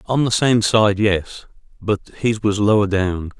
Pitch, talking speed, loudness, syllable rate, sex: 105 Hz, 175 wpm, -18 LUFS, 4.0 syllables/s, male